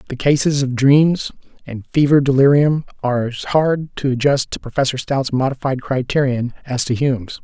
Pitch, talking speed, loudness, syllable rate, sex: 135 Hz, 160 wpm, -17 LUFS, 5.0 syllables/s, male